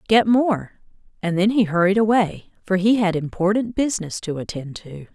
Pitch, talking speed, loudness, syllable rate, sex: 195 Hz, 175 wpm, -20 LUFS, 5.2 syllables/s, female